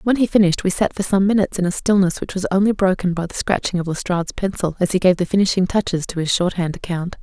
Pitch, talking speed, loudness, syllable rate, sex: 185 Hz, 255 wpm, -19 LUFS, 6.7 syllables/s, female